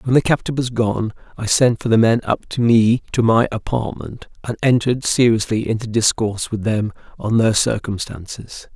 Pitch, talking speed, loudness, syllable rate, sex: 110 Hz, 180 wpm, -18 LUFS, 5.0 syllables/s, male